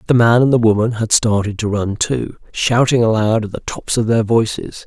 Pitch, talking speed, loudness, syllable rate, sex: 115 Hz, 220 wpm, -16 LUFS, 5.1 syllables/s, male